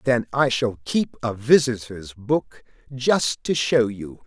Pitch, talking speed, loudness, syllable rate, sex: 120 Hz, 155 wpm, -22 LUFS, 3.6 syllables/s, male